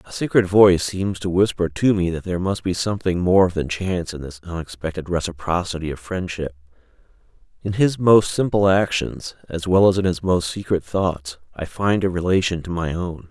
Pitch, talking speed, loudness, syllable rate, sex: 90 Hz, 190 wpm, -20 LUFS, 5.2 syllables/s, male